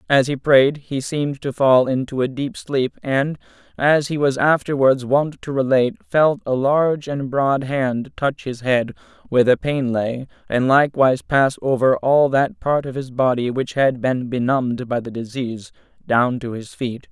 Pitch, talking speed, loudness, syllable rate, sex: 135 Hz, 185 wpm, -19 LUFS, 4.5 syllables/s, male